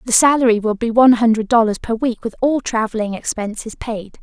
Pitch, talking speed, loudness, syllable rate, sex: 230 Hz, 200 wpm, -17 LUFS, 5.8 syllables/s, female